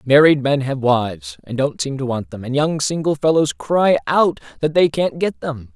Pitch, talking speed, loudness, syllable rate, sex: 140 Hz, 220 wpm, -18 LUFS, 4.7 syllables/s, male